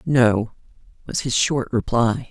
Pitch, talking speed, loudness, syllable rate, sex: 120 Hz, 130 wpm, -20 LUFS, 3.5 syllables/s, female